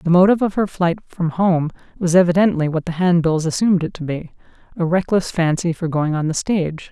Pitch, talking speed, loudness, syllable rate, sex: 170 Hz, 200 wpm, -18 LUFS, 5.7 syllables/s, female